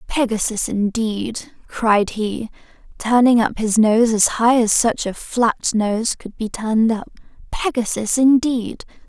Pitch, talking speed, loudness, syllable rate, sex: 225 Hz, 130 wpm, -18 LUFS, 3.8 syllables/s, female